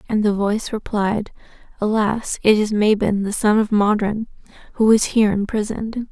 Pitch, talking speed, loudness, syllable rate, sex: 210 Hz, 155 wpm, -19 LUFS, 5.1 syllables/s, female